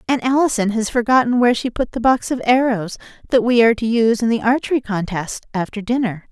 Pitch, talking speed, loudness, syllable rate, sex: 235 Hz, 210 wpm, -18 LUFS, 6.1 syllables/s, female